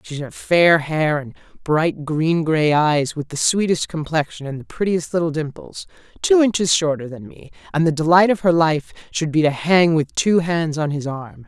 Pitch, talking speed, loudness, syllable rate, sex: 160 Hz, 205 wpm, -18 LUFS, 4.7 syllables/s, female